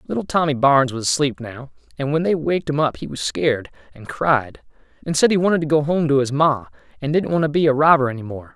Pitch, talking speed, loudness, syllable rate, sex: 140 Hz, 250 wpm, -19 LUFS, 6.3 syllables/s, male